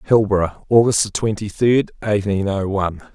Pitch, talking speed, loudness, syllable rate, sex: 105 Hz, 155 wpm, -18 LUFS, 5.1 syllables/s, male